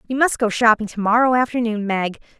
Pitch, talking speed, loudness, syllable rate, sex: 230 Hz, 175 wpm, -18 LUFS, 6.0 syllables/s, female